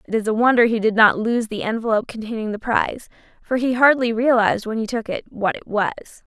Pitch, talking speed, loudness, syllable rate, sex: 225 Hz, 225 wpm, -19 LUFS, 6.2 syllables/s, female